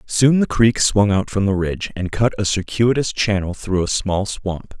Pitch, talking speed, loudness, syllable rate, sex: 105 Hz, 215 wpm, -18 LUFS, 4.6 syllables/s, male